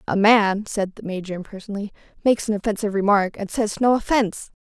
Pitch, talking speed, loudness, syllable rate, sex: 210 Hz, 180 wpm, -21 LUFS, 6.5 syllables/s, female